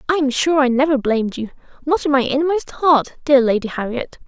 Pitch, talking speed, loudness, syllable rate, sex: 275 Hz, 210 wpm, -17 LUFS, 5.8 syllables/s, female